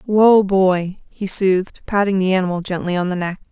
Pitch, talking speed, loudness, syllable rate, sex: 190 Hz, 190 wpm, -17 LUFS, 4.9 syllables/s, female